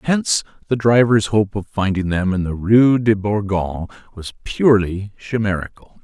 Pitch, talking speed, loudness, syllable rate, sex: 105 Hz, 150 wpm, -18 LUFS, 4.8 syllables/s, male